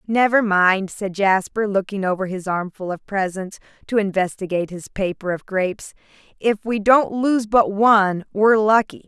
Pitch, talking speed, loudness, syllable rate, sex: 200 Hz, 160 wpm, -19 LUFS, 4.8 syllables/s, female